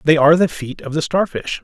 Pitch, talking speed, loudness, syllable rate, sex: 160 Hz, 255 wpm, -17 LUFS, 5.9 syllables/s, male